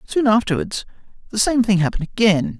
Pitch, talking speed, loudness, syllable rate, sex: 205 Hz, 160 wpm, -19 LUFS, 5.9 syllables/s, male